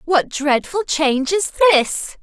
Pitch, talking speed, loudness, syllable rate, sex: 315 Hz, 135 wpm, -17 LUFS, 3.7 syllables/s, female